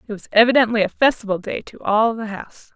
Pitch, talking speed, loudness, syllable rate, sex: 220 Hz, 220 wpm, -18 LUFS, 6.3 syllables/s, female